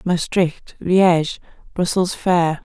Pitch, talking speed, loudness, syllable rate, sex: 175 Hz, 90 wpm, -18 LUFS, 3.2 syllables/s, female